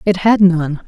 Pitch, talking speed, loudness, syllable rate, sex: 180 Hz, 205 wpm, -13 LUFS, 4.0 syllables/s, female